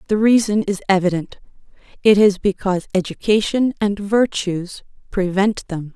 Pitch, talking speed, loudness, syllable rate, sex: 200 Hz, 120 wpm, -18 LUFS, 4.7 syllables/s, female